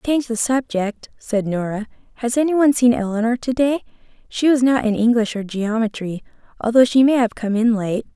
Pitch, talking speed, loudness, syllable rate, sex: 235 Hz, 200 wpm, -19 LUFS, 5.6 syllables/s, female